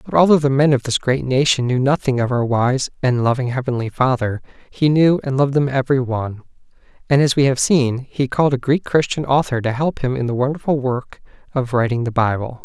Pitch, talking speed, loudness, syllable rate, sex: 130 Hz, 220 wpm, -18 LUFS, 5.7 syllables/s, male